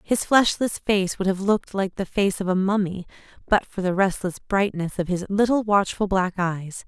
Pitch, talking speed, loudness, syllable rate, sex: 195 Hz, 200 wpm, -23 LUFS, 4.9 syllables/s, female